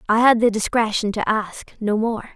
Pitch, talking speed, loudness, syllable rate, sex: 220 Hz, 205 wpm, -20 LUFS, 4.7 syllables/s, female